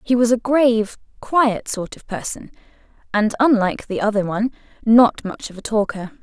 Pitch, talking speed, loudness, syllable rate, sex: 225 Hz, 175 wpm, -19 LUFS, 4.1 syllables/s, female